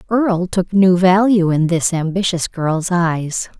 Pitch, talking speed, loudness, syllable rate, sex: 180 Hz, 150 wpm, -16 LUFS, 3.9 syllables/s, female